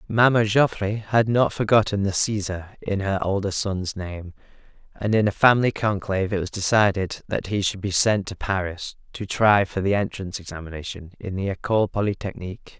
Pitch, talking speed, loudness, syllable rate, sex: 100 Hz, 175 wpm, -22 LUFS, 5.4 syllables/s, male